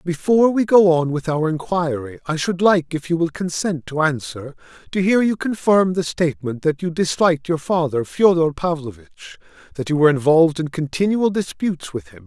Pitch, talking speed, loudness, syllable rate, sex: 165 Hz, 185 wpm, -19 LUFS, 5.5 syllables/s, male